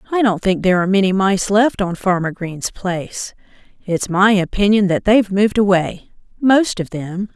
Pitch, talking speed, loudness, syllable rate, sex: 195 Hz, 170 wpm, -16 LUFS, 5.1 syllables/s, female